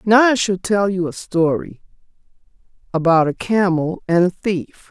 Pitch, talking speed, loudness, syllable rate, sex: 185 Hz, 160 wpm, -18 LUFS, 4.4 syllables/s, female